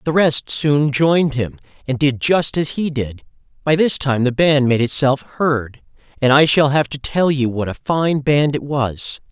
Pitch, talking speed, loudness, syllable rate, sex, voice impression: 140 Hz, 215 wpm, -17 LUFS, 4.3 syllables/s, male, masculine, middle-aged, tensed, powerful, clear, fluent, slightly intellectual, slightly mature, slightly friendly, wild, lively, slightly sharp